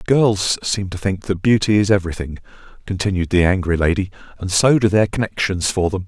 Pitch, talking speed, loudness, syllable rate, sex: 95 Hz, 190 wpm, -18 LUFS, 5.7 syllables/s, male